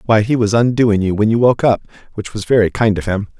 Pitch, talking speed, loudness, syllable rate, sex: 110 Hz, 265 wpm, -15 LUFS, 6.0 syllables/s, male